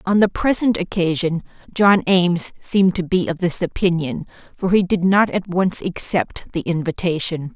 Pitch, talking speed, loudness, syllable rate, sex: 180 Hz, 165 wpm, -19 LUFS, 4.8 syllables/s, female